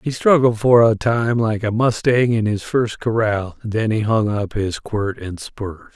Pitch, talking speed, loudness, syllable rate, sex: 110 Hz, 210 wpm, -18 LUFS, 4.2 syllables/s, male